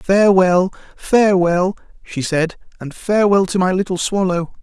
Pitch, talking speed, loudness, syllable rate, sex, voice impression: 185 Hz, 130 wpm, -16 LUFS, 4.7 syllables/s, male, masculine, tensed, powerful, very fluent, slightly refreshing, slightly unique, lively, slightly intense